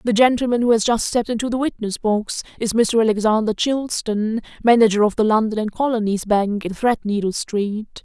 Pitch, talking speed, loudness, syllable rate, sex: 220 Hz, 180 wpm, -19 LUFS, 5.5 syllables/s, female